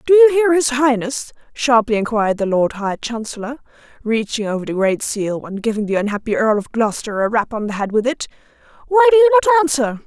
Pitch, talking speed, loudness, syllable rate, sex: 245 Hz, 210 wpm, -17 LUFS, 6.0 syllables/s, female